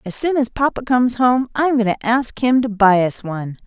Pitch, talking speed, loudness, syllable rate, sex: 235 Hz, 260 wpm, -17 LUFS, 5.7 syllables/s, female